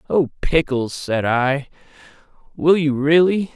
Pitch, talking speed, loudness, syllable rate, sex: 145 Hz, 120 wpm, -18 LUFS, 3.8 syllables/s, male